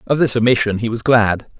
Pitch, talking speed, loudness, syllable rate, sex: 115 Hz, 225 wpm, -16 LUFS, 5.7 syllables/s, male